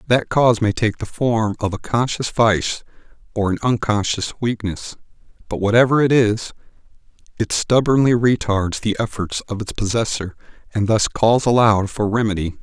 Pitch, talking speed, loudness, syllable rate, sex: 110 Hz, 150 wpm, -19 LUFS, 4.9 syllables/s, male